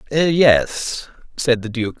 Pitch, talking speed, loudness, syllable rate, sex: 130 Hz, 120 wpm, -17 LUFS, 2.7 syllables/s, male